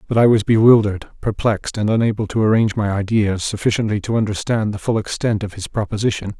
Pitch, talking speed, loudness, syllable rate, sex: 105 Hz, 190 wpm, -18 LUFS, 6.5 syllables/s, male